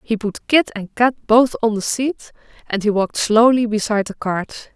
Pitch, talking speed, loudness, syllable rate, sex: 225 Hz, 200 wpm, -18 LUFS, 4.9 syllables/s, female